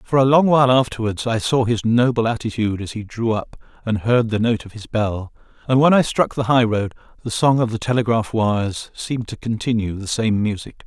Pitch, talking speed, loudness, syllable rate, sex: 115 Hz, 220 wpm, -19 LUFS, 5.5 syllables/s, male